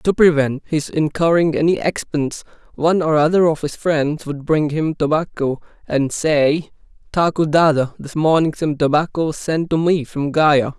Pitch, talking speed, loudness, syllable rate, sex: 155 Hz, 165 wpm, -18 LUFS, 4.7 syllables/s, male